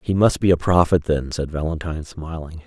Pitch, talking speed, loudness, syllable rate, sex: 80 Hz, 205 wpm, -20 LUFS, 5.5 syllables/s, male